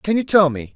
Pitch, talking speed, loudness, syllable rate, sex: 175 Hz, 320 wpm, -17 LUFS, 5.6 syllables/s, male